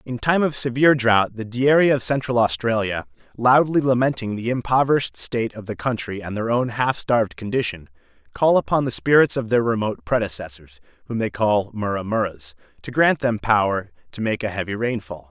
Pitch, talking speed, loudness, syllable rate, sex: 115 Hz, 185 wpm, -21 LUFS, 5.5 syllables/s, male